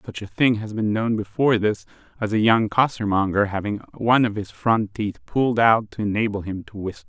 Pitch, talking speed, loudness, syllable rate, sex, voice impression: 110 Hz, 220 wpm, -22 LUFS, 5.7 syllables/s, male, masculine, adult-like, tensed, bright, soft, slightly raspy, cool, intellectual, friendly, reassuring, wild, lively, kind